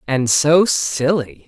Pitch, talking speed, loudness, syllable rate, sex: 140 Hz, 120 wpm, -16 LUFS, 3.0 syllables/s, male